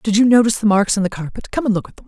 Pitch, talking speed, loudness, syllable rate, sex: 210 Hz, 345 wpm, -16 LUFS, 8.3 syllables/s, female